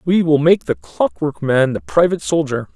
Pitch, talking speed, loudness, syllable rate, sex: 135 Hz, 195 wpm, -17 LUFS, 5.0 syllables/s, male